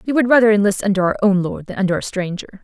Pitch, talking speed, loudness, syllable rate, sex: 200 Hz, 275 wpm, -17 LUFS, 7.0 syllables/s, female